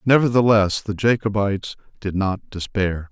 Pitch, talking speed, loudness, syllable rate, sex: 105 Hz, 115 wpm, -20 LUFS, 4.7 syllables/s, male